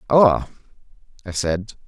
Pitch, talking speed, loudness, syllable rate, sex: 105 Hz, 95 wpm, -20 LUFS, 3.5 syllables/s, male